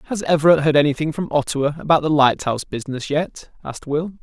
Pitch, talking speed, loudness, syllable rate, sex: 150 Hz, 185 wpm, -19 LUFS, 6.5 syllables/s, male